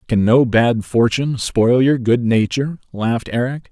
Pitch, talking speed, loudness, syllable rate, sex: 120 Hz, 160 wpm, -17 LUFS, 4.7 syllables/s, male